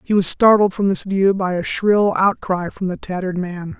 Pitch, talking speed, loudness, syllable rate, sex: 175 Hz, 220 wpm, -18 LUFS, 4.9 syllables/s, male